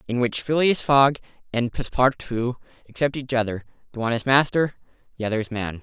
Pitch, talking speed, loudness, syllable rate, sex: 125 Hz, 175 wpm, -23 LUFS, 6.0 syllables/s, male